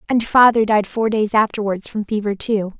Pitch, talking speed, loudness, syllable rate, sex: 215 Hz, 195 wpm, -17 LUFS, 5.1 syllables/s, female